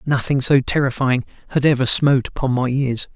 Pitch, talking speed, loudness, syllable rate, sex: 130 Hz, 170 wpm, -18 LUFS, 5.5 syllables/s, male